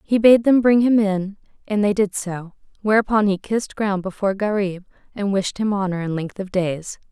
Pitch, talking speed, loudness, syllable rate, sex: 200 Hz, 200 wpm, -20 LUFS, 5.1 syllables/s, female